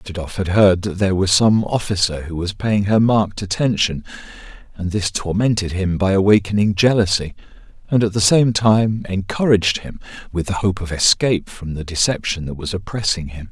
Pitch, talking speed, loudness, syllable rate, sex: 100 Hz, 180 wpm, -18 LUFS, 5.4 syllables/s, male